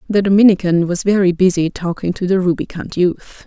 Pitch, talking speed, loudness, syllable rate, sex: 185 Hz, 175 wpm, -15 LUFS, 5.5 syllables/s, female